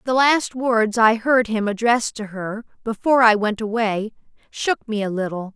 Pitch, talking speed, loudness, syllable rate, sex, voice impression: 225 Hz, 185 wpm, -20 LUFS, 4.5 syllables/s, female, feminine, slightly adult-like, tensed, slightly powerful, slightly clear, slightly sincere, slightly friendly, slightly unique